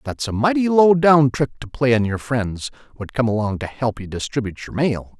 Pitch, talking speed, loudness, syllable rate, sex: 125 Hz, 230 wpm, -19 LUFS, 5.2 syllables/s, male